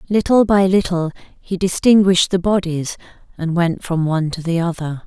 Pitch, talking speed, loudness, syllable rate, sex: 180 Hz, 165 wpm, -17 LUFS, 5.2 syllables/s, female